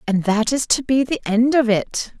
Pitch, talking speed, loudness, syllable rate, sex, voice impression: 235 Hz, 245 wpm, -18 LUFS, 4.6 syllables/s, female, feminine, adult-like, slightly bright, soft, fluent, raspy, slightly cute, intellectual, friendly, slightly elegant, kind, slightly sharp